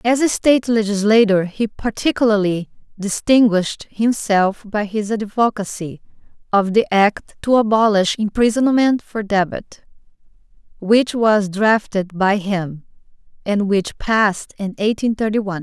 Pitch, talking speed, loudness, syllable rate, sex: 210 Hz, 120 wpm, -17 LUFS, 4.3 syllables/s, female